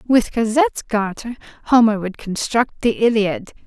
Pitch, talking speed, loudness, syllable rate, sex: 225 Hz, 130 wpm, -18 LUFS, 4.6 syllables/s, female